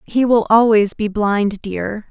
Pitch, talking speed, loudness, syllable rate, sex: 215 Hz, 170 wpm, -16 LUFS, 3.6 syllables/s, female